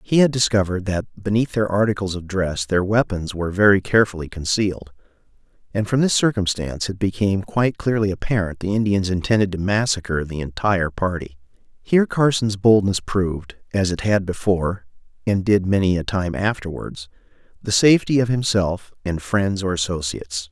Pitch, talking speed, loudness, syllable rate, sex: 100 Hz, 160 wpm, -20 LUFS, 5.6 syllables/s, male